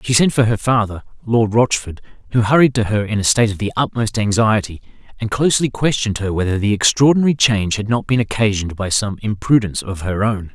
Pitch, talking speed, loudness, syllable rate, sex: 110 Hz, 205 wpm, -17 LUFS, 6.2 syllables/s, male